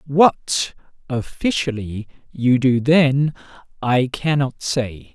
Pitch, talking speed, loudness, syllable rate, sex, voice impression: 135 Hz, 70 wpm, -19 LUFS, 4.2 syllables/s, male, masculine, middle-aged, slightly thick, tensed, powerful, slightly bright, clear, halting, cool, intellectual, mature, friendly, reassuring, wild, lively, intense